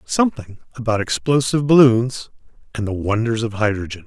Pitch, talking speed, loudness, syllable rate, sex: 115 Hz, 135 wpm, -18 LUFS, 5.6 syllables/s, male